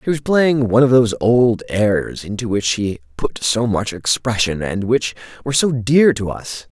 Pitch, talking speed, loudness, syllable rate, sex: 115 Hz, 195 wpm, -17 LUFS, 4.6 syllables/s, male